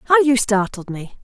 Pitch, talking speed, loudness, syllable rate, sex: 220 Hz, 195 wpm, -17 LUFS, 4.4 syllables/s, female